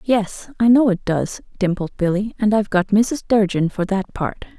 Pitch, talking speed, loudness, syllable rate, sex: 205 Hz, 195 wpm, -19 LUFS, 4.8 syllables/s, female